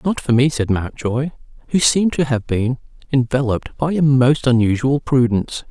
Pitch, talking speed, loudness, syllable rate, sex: 130 Hz, 170 wpm, -17 LUFS, 5.2 syllables/s, male